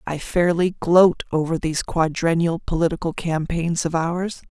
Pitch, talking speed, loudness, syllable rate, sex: 165 Hz, 135 wpm, -21 LUFS, 4.6 syllables/s, female